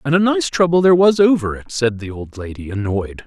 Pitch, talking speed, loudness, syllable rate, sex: 135 Hz, 240 wpm, -16 LUFS, 5.8 syllables/s, male